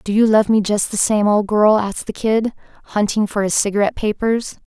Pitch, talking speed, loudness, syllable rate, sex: 210 Hz, 220 wpm, -17 LUFS, 5.5 syllables/s, female